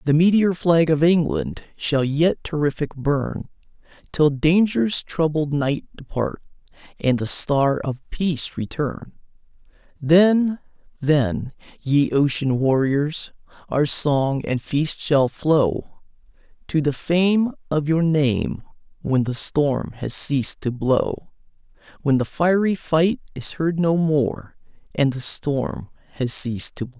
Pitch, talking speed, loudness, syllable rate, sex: 150 Hz, 130 wpm, -21 LUFS, 3.5 syllables/s, male